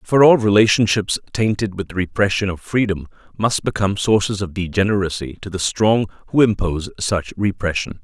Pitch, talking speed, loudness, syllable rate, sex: 100 Hz, 150 wpm, -18 LUFS, 5.4 syllables/s, male